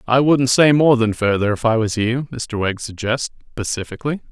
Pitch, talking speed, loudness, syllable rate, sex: 120 Hz, 195 wpm, -18 LUFS, 5.2 syllables/s, male